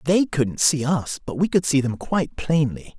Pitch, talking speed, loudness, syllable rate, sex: 150 Hz, 220 wpm, -22 LUFS, 4.6 syllables/s, male